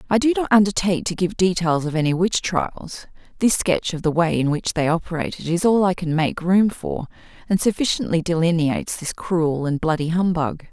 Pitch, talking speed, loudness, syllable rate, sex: 175 Hz, 195 wpm, -20 LUFS, 5.3 syllables/s, female